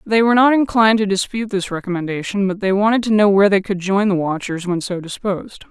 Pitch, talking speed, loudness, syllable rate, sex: 200 Hz, 230 wpm, -17 LUFS, 6.5 syllables/s, female